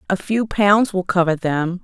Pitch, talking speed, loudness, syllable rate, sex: 185 Hz, 195 wpm, -18 LUFS, 4.2 syllables/s, female